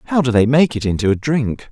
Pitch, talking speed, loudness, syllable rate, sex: 125 Hz, 280 wpm, -16 LUFS, 6.2 syllables/s, male